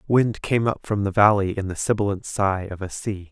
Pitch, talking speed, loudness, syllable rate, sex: 100 Hz, 235 wpm, -22 LUFS, 5.2 syllables/s, male